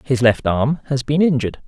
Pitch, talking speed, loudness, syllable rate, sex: 135 Hz, 215 wpm, -18 LUFS, 5.4 syllables/s, male